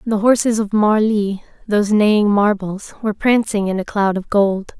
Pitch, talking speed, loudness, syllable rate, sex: 210 Hz, 175 wpm, -17 LUFS, 4.8 syllables/s, female